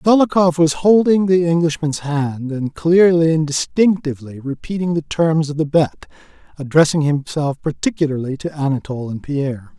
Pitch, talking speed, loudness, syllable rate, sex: 155 Hz, 140 wpm, -17 LUFS, 4.8 syllables/s, male